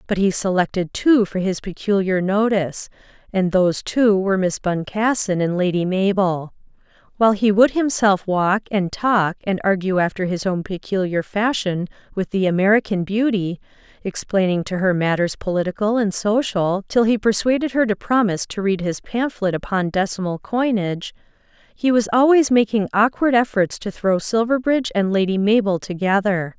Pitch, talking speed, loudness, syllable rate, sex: 200 Hz, 145 wpm, -19 LUFS, 5.1 syllables/s, female